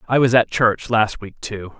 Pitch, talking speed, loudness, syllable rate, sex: 115 Hz, 235 wpm, -18 LUFS, 4.4 syllables/s, male